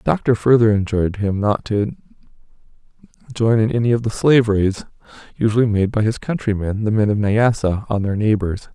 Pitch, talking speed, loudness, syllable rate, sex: 110 Hz, 180 wpm, -18 LUFS, 5.8 syllables/s, male